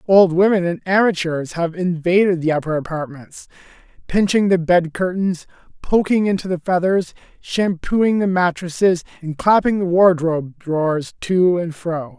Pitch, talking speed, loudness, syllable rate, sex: 175 Hz, 140 wpm, -18 LUFS, 4.5 syllables/s, male